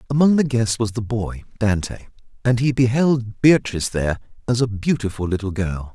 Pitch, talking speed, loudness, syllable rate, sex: 115 Hz, 170 wpm, -20 LUFS, 5.2 syllables/s, male